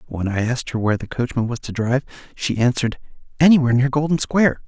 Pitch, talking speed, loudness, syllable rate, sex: 125 Hz, 205 wpm, -20 LUFS, 7.1 syllables/s, male